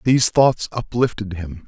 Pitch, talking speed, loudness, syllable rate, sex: 110 Hz, 145 wpm, -19 LUFS, 4.6 syllables/s, male